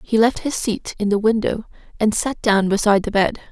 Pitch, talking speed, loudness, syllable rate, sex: 215 Hz, 220 wpm, -19 LUFS, 5.4 syllables/s, female